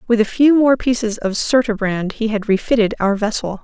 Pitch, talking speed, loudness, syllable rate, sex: 220 Hz, 200 wpm, -17 LUFS, 5.3 syllables/s, female